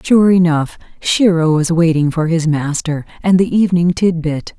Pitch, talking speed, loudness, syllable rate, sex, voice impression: 170 Hz, 170 wpm, -14 LUFS, 4.6 syllables/s, female, feminine, middle-aged, tensed, slightly dark, soft, intellectual, slightly friendly, elegant, lively, strict, slightly modest